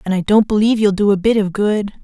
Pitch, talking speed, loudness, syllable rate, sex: 205 Hz, 295 wpm, -15 LUFS, 6.5 syllables/s, female